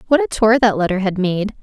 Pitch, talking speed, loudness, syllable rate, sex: 215 Hz, 260 wpm, -16 LUFS, 6.0 syllables/s, female